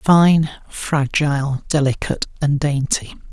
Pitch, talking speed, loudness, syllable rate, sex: 145 Hz, 90 wpm, -18 LUFS, 4.0 syllables/s, male